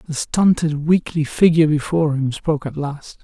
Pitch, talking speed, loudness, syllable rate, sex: 155 Hz, 165 wpm, -18 LUFS, 5.3 syllables/s, male